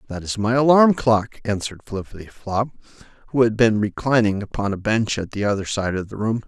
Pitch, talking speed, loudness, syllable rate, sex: 110 Hz, 195 wpm, -21 LUFS, 5.6 syllables/s, male